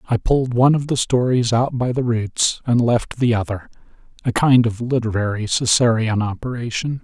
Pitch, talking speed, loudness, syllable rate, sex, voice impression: 120 Hz, 160 wpm, -19 LUFS, 5.0 syllables/s, male, masculine, slightly old, slightly relaxed, powerful, hard, raspy, mature, reassuring, wild, slightly lively, slightly strict